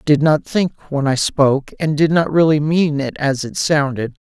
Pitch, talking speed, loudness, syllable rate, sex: 145 Hz, 225 wpm, -17 LUFS, 4.8 syllables/s, male